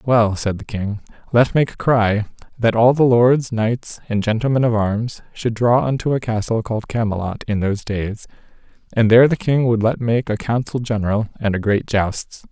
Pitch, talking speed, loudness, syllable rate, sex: 115 Hz, 195 wpm, -18 LUFS, 4.9 syllables/s, male